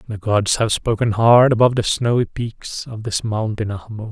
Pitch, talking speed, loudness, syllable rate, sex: 110 Hz, 190 wpm, -18 LUFS, 5.0 syllables/s, male